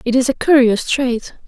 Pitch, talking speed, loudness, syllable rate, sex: 250 Hz, 205 wpm, -15 LUFS, 4.8 syllables/s, female